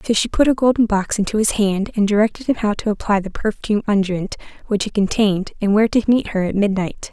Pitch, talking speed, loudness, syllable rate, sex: 210 Hz, 235 wpm, -18 LUFS, 6.2 syllables/s, female